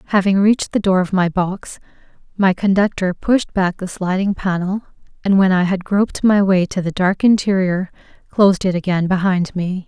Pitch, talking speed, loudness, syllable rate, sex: 190 Hz, 180 wpm, -17 LUFS, 5.1 syllables/s, female